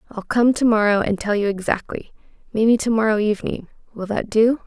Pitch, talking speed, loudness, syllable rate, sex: 215 Hz, 165 wpm, -19 LUFS, 5.9 syllables/s, female